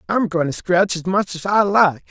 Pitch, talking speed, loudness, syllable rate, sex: 185 Hz, 255 wpm, -18 LUFS, 4.7 syllables/s, male